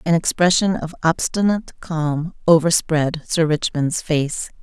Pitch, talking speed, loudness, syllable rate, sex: 165 Hz, 115 wpm, -19 LUFS, 4.1 syllables/s, female